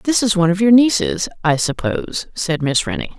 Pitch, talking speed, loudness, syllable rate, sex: 190 Hz, 205 wpm, -17 LUFS, 5.4 syllables/s, female